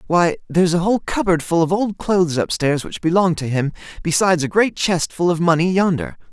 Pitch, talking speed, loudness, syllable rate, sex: 170 Hz, 220 wpm, -18 LUFS, 5.9 syllables/s, male